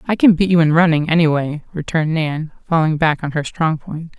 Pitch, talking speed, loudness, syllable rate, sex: 160 Hz, 230 wpm, -17 LUFS, 5.5 syllables/s, female